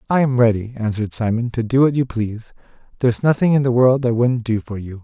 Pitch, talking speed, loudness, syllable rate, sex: 120 Hz, 240 wpm, -18 LUFS, 6.2 syllables/s, male